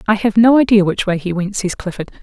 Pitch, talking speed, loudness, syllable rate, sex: 200 Hz, 270 wpm, -15 LUFS, 6.1 syllables/s, female